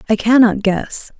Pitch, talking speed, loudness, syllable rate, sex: 215 Hz, 150 wpm, -14 LUFS, 4.2 syllables/s, female